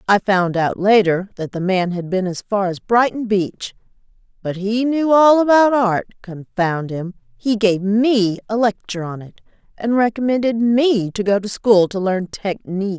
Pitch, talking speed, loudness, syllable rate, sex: 205 Hz, 180 wpm, -18 LUFS, 4.4 syllables/s, female